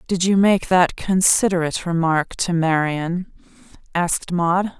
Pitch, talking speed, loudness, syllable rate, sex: 175 Hz, 125 wpm, -19 LUFS, 4.2 syllables/s, female